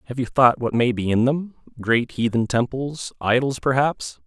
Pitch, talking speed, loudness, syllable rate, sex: 125 Hz, 170 wpm, -21 LUFS, 4.6 syllables/s, male